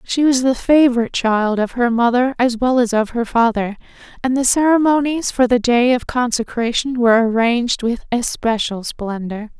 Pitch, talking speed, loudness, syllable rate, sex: 240 Hz, 170 wpm, -17 LUFS, 5.0 syllables/s, female